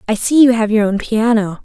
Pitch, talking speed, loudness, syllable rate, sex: 220 Hz, 255 wpm, -13 LUFS, 5.5 syllables/s, female